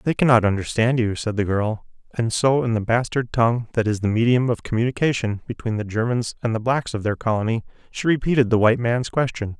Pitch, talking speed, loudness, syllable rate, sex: 115 Hz, 215 wpm, -21 LUFS, 5.9 syllables/s, male